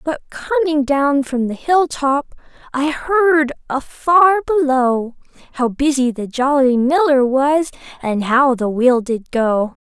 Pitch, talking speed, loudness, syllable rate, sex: 275 Hz, 140 wpm, -16 LUFS, 3.5 syllables/s, female